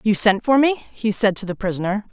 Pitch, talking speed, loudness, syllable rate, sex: 210 Hz, 255 wpm, -19 LUFS, 5.7 syllables/s, female